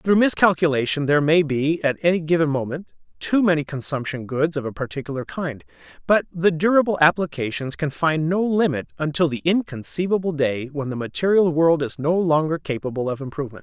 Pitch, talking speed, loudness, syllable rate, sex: 155 Hz, 170 wpm, -21 LUFS, 5.6 syllables/s, male